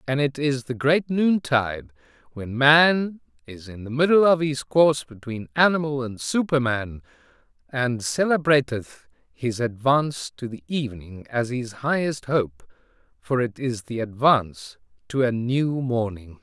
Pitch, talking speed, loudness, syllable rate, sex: 130 Hz, 140 wpm, -22 LUFS, 4.4 syllables/s, male